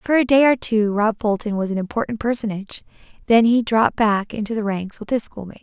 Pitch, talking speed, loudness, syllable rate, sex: 220 Hz, 225 wpm, -19 LUFS, 6.0 syllables/s, female